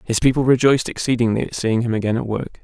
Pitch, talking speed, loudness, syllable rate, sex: 120 Hz, 230 wpm, -19 LUFS, 6.7 syllables/s, male